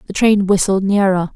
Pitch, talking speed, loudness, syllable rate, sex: 195 Hz, 175 wpm, -15 LUFS, 5.0 syllables/s, female